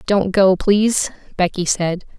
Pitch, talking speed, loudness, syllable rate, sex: 190 Hz, 135 wpm, -17 LUFS, 4.1 syllables/s, female